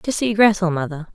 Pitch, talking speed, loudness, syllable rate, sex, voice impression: 190 Hz, 210 wpm, -18 LUFS, 5.7 syllables/s, female, feminine, adult-like, tensed, slightly hard, clear, intellectual, calm, reassuring, elegant, lively, slightly sharp